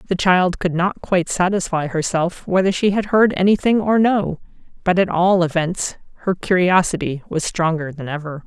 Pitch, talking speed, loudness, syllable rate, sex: 180 Hz, 170 wpm, -18 LUFS, 4.9 syllables/s, female